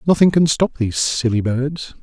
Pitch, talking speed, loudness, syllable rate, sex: 135 Hz, 180 wpm, -17 LUFS, 5.0 syllables/s, male